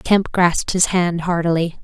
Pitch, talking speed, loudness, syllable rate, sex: 175 Hz, 165 wpm, -18 LUFS, 4.5 syllables/s, female